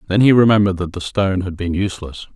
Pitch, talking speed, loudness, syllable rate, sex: 95 Hz, 230 wpm, -17 LUFS, 7.1 syllables/s, male